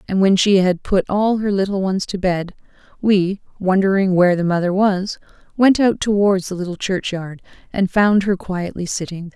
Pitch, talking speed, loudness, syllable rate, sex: 190 Hz, 180 wpm, -18 LUFS, 5.1 syllables/s, female